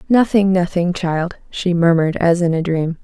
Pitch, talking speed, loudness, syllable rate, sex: 175 Hz, 180 wpm, -17 LUFS, 4.8 syllables/s, female